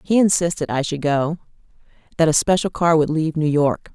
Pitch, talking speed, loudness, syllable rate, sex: 160 Hz, 180 wpm, -19 LUFS, 5.6 syllables/s, female